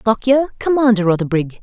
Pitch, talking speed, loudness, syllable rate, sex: 225 Hz, 185 wpm, -16 LUFS, 5.7 syllables/s, female